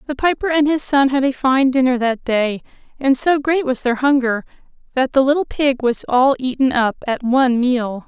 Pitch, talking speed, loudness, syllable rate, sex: 265 Hz, 210 wpm, -17 LUFS, 4.9 syllables/s, female